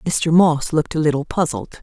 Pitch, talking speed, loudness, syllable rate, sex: 155 Hz, 195 wpm, -18 LUFS, 5.0 syllables/s, female